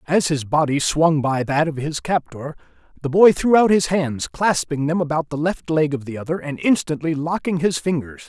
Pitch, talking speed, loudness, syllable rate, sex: 150 Hz, 210 wpm, -19 LUFS, 5.0 syllables/s, male